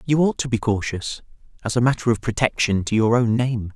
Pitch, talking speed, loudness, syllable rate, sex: 115 Hz, 225 wpm, -21 LUFS, 5.6 syllables/s, male